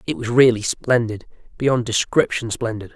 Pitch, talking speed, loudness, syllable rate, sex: 115 Hz, 120 wpm, -19 LUFS, 4.8 syllables/s, male